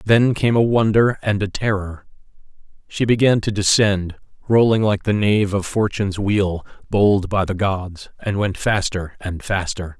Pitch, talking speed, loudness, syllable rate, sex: 100 Hz, 160 wpm, -19 LUFS, 4.4 syllables/s, male